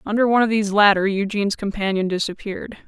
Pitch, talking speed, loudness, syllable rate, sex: 205 Hz, 165 wpm, -19 LUFS, 6.9 syllables/s, female